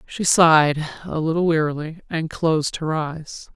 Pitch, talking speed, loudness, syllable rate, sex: 160 Hz, 150 wpm, -20 LUFS, 4.6 syllables/s, female